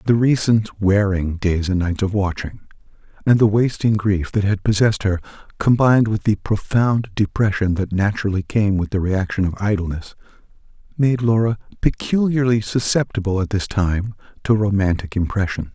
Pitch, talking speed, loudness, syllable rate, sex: 100 Hz, 150 wpm, -19 LUFS, 5.1 syllables/s, male